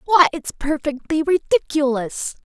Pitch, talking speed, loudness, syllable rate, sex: 300 Hz, 95 wpm, -20 LUFS, 4.2 syllables/s, female